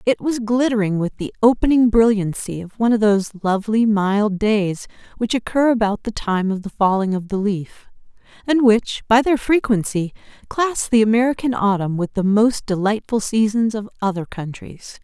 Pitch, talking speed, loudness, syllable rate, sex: 215 Hz, 170 wpm, -19 LUFS, 4.9 syllables/s, female